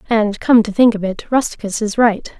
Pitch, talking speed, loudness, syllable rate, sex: 220 Hz, 225 wpm, -16 LUFS, 5.0 syllables/s, female